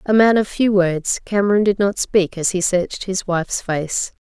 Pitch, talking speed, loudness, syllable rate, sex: 190 Hz, 215 wpm, -18 LUFS, 4.8 syllables/s, female